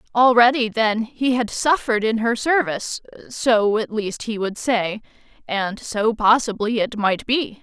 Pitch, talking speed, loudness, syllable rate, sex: 225 Hz, 150 wpm, -20 LUFS, 4.2 syllables/s, female